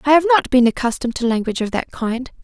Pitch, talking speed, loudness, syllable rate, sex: 245 Hz, 245 wpm, -18 LUFS, 6.6 syllables/s, female